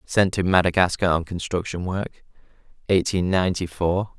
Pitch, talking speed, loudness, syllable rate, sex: 90 Hz, 130 wpm, -22 LUFS, 5.0 syllables/s, male